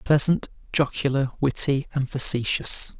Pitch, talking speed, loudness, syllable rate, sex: 140 Hz, 100 wpm, -21 LUFS, 4.3 syllables/s, male